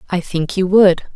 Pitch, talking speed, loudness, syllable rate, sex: 180 Hz, 210 wpm, -15 LUFS, 4.9 syllables/s, female